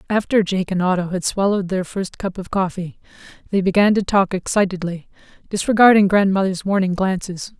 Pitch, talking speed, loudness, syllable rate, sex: 190 Hz, 160 wpm, -19 LUFS, 5.6 syllables/s, female